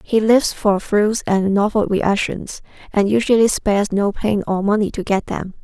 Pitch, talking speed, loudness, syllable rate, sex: 205 Hz, 180 wpm, -18 LUFS, 4.7 syllables/s, female